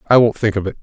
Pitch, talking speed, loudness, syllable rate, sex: 105 Hz, 365 wpm, -16 LUFS, 8.5 syllables/s, male